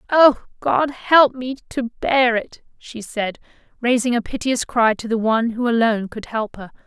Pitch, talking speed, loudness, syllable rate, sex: 235 Hz, 185 wpm, -19 LUFS, 4.6 syllables/s, female